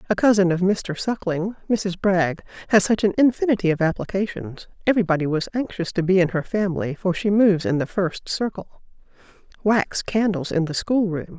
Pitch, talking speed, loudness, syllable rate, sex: 190 Hz, 180 wpm, -21 LUFS, 5.5 syllables/s, female